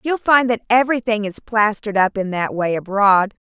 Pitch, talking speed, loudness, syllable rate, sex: 215 Hz, 190 wpm, -17 LUFS, 5.4 syllables/s, female